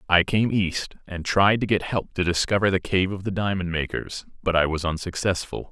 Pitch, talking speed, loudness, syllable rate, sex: 95 Hz, 210 wpm, -23 LUFS, 5.1 syllables/s, male